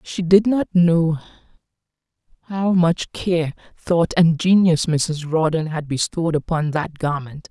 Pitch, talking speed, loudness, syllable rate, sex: 165 Hz, 135 wpm, -19 LUFS, 3.9 syllables/s, female